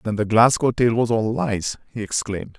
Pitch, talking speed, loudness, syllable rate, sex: 115 Hz, 210 wpm, -20 LUFS, 5.1 syllables/s, male